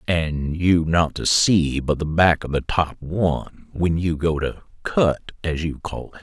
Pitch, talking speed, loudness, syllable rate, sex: 80 Hz, 200 wpm, -21 LUFS, 3.9 syllables/s, male